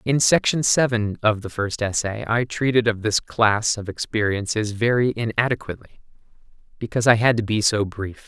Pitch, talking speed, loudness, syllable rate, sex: 110 Hz, 165 wpm, -21 LUFS, 5.1 syllables/s, male